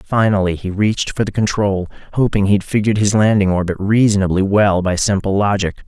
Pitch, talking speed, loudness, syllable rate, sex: 100 Hz, 175 wpm, -16 LUFS, 5.8 syllables/s, male